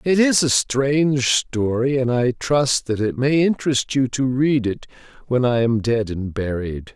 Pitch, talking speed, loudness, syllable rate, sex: 125 Hz, 190 wpm, -19 LUFS, 4.2 syllables/s, male